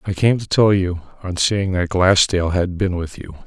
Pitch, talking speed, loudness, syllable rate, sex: 95 Hz, 210 wpm, -18 LUFS, 4.9 syllables/s, male